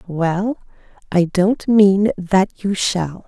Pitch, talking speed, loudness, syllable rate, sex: 190 Hz, 130 wpm, -17 LUFS, 2.8 syllables/s, female